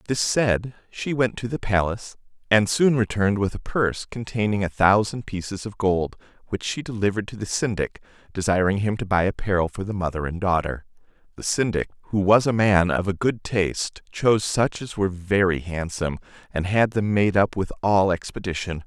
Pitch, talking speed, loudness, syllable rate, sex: 100 Hz, 190 wpm, -23 LUFS, 5.4 syllables/s, male